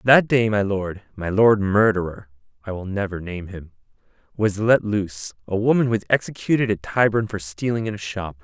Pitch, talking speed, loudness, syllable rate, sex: 100 Hz, 165 wpm, -21 LUFS, 6.3 syllables/s, male